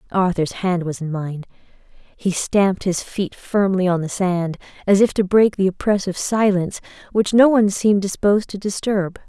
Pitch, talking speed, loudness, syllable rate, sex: 190 Hz, 175 wpm, -19 LUFS, 5.0 syllables/s, female